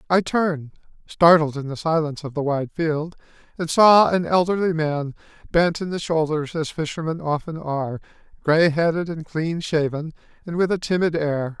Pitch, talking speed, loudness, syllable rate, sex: 160 Hz, 170 wpm, -21 LUFS, 5.0 syllables/s, male